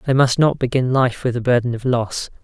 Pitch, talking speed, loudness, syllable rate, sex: 125 Hz, 245 wpm, -18 LUFS, 5.5 syllables/s, male